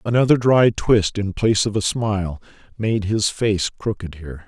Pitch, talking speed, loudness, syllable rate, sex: 105 Hz, 175 wpm, -19 LUFS, 4.9 syllables/s, male